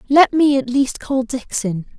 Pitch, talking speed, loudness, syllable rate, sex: 255 Hz, 180 wpm, -17 LUFS, 4.1 syllables/s, female